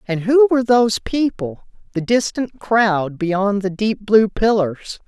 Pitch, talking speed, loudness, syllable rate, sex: 210 Hz, 155 wpm, -17 LUFS, 3.9 syllables/s, female